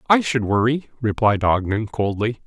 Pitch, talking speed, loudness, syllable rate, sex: 115 Hz, 145 wpm, -20 LUFS, 4.7 syllables/s, male